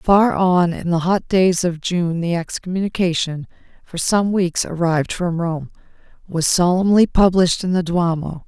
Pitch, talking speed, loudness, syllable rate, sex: 175 Hz, 155 wpm, -18 LUFS, 4.6 syllables/s, female